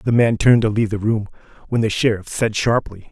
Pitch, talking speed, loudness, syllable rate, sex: 110 Hz, 230 wpm, -18 LUFS, 6.1 syllables/s, male